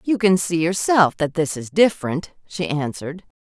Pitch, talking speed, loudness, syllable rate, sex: 170 Hz, 175 wpm, -20 LUFS, 4.9 syllables/s, female